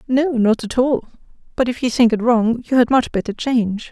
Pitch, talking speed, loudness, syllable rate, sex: 240 Hz, 230 wpm, -17 LUFS, 5.3 syllables/s, female